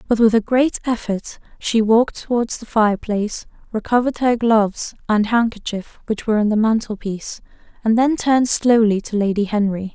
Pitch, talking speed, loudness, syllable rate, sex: 220 Hz, 170 wpm, -18 LUFS, 5.5 syllables/s, female